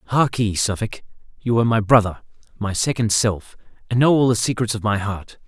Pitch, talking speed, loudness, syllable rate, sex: 110 Hz, 185 wpm, -20 LUFS, 5.5 syllables/s, male